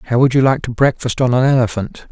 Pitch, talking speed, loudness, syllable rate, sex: 125 Hz, 225 wpm, -15 LUFS, 5.8 syllables/s, male